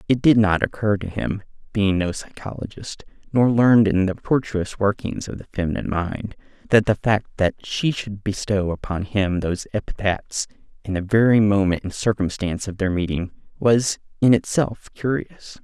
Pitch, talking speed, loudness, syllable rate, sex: 100 Hz, 165 wpm, -21 LUFS, 5.0 syllables/s, male